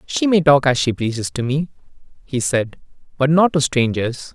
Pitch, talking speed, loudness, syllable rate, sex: 140 Hz, 195 wpm, -18 LUFS, 4.9 syllables/s, male